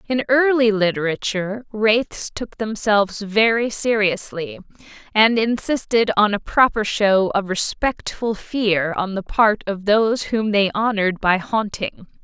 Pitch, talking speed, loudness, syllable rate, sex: 210 Hz, 130 wpm, -19 LUFS, 4.1 syllables/s, female